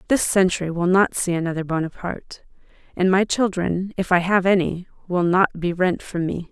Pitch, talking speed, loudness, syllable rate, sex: 180 Hz, 185 wpm, -21 LUFS, 5.3 syllables/s, female